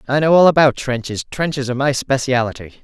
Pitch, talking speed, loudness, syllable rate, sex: 135 Hz, 190 wpm, -16 LUFS, 5.8 syllables/s, male